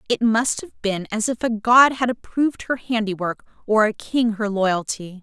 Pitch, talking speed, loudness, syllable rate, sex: 220 Hz, 195 wpm, -21 LUFS, 4.6 syllables/s, female